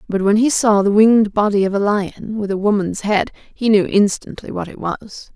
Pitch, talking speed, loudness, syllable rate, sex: 205 Hz, 225 wpm, -16 LUFS, 5.0 syllables/s, female